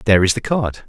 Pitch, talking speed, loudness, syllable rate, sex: 110 Hz, 275 wpm, -17 LUFS, 6.9 syllables/s, male